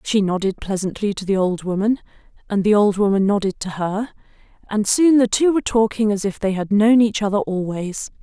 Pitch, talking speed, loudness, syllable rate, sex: 210 Hz, 205 wpm, -19 LUFS, 5.5 syllables/s, female